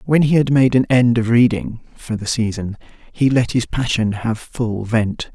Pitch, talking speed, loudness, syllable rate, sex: 120 Hz, 180 wpm, -17 LUFS, 4.6 syllables/s, male